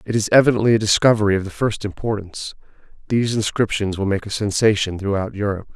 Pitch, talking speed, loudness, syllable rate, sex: 105 Hz, 175 wpm, -19 LUFS, 6.7 syllables/s, male